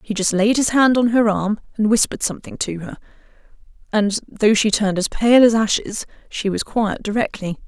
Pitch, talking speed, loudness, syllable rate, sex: 215 Hz, 195 wpm, -18 LUFS, 5.3 syllables/s, female